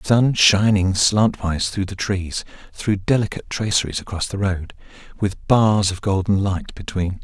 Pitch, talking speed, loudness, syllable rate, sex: 100 Hz, 160 wpm, -20 LUFS, 4.6 syllables/s, male